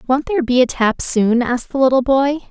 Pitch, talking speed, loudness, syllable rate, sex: 260 Hz, 240 wpm, -16 LUFS, 5.8 syllables/s, female